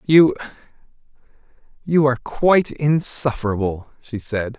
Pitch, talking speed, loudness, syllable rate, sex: 135 Hz, 90 wpm, -19 LUFS, 4.5 syllables/s, male